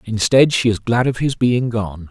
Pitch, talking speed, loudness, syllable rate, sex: 115 Hz, 230 wpm, -17 LUFS, 4.5 syllables/s, male